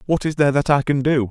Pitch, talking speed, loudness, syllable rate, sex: 140 Hz, 325 wpm, -18 LUFS, 6.8 syllables/s, male